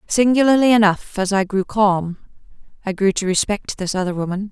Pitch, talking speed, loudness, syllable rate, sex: 200 Hz, 175 wpm, -18 LUFS, 5.4 syllables/s, female